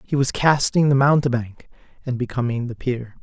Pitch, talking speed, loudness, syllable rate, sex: 130 Hz, 165 wpm, -20 LUFS, 5.1 syllables/s, male